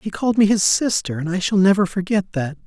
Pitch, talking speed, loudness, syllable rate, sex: 190 Hz, 245 wpm, -18 LUFS, 5.9 syllables/s, male